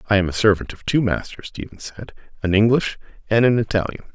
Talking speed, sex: 205 wpm, male